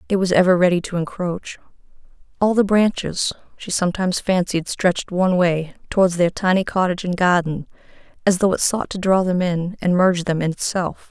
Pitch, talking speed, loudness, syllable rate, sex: 180 Hz, 180 wpm, -19 LUFS, 5.6 syllables/s, female